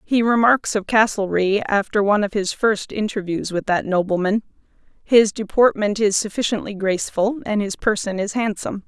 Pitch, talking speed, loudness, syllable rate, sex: 205 Hz, 155 wpm, -20 LUFS, 5.2 syllables/s, female